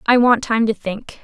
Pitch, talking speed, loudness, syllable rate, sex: 225 Hz, 245 wpm, -17 LUFS, 4.5 syllables/s, female